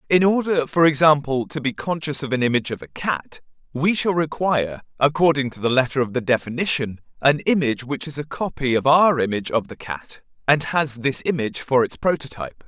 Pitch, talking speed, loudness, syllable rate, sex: 140 Hz, 200 wpm, -21 LUFS, 5.7 syllables/s, male